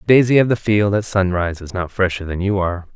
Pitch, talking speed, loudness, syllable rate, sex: 100 Hz, 265 wpm, -18 LUFS, 6.3 syllables/s, male